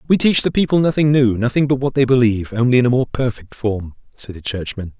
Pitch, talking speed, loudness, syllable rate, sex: 125 Hz, 240 wpm, -17 LUFS, 6.2 syllables/s, male